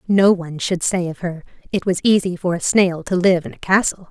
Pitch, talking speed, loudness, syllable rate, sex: 180 Hz, 250 wpm, -18 LUFS, 5.5 syllables/s, female